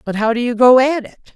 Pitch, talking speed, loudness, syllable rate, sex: 245 Hz, 310 wpm, -14 LUFS, 6.5 syllables/s, female